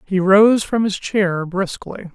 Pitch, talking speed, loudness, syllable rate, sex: 195 Hz, 170 wpm, -17 LUFS, 4.1 syllables/s, male